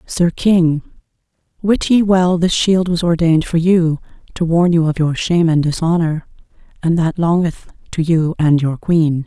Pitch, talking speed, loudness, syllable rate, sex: 165 Hz, 175 wpm, -15 LUFS, 4.5 syllables/s, female